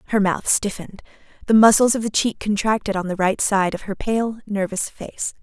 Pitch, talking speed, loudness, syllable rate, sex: 205 Hz, 200 wpm, -20 LUFS, 5.2 syllables/s, female